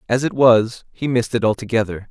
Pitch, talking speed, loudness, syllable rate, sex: 115 Hz, 200 wpm, -18 LUFS, 5.9 syllables/s, male